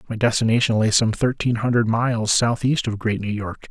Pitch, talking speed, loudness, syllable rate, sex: 115 Hz, 195 wpm, -20 LUFS, 5.4 syllables/s, male